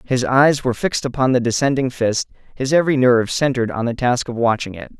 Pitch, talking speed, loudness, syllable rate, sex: 125 Hz, 215 wpm, -18 LUFS, 6.4 syllables/s, male